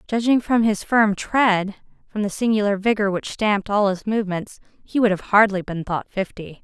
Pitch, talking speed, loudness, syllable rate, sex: 205 Hz, 190 wpm, -20 LUFS, 5.2 syllables/s, female